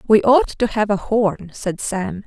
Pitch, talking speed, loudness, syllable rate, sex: 210 Hz, 210 wpm, -19 LUFS, 3.8 syllables/s, female